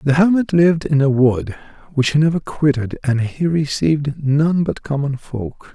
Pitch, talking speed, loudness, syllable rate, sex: 145 Hz, 180 wpm, -17 LUFS, 4.7 syllables/s, male